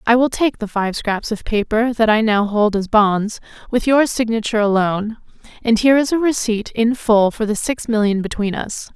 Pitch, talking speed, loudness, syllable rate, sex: 220 Hz, 210 wpm, -17 LUFS, 5.1 syllables/s, female